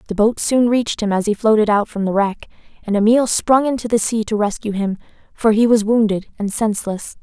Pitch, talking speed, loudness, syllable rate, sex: 215 Hz, 225 wpm, -17 LUFS, 5.4 syllables/s, female